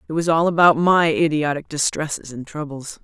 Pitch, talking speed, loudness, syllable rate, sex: 155 Hz, 180 wpm, -19 LUFS, 5.3 syllables/s, female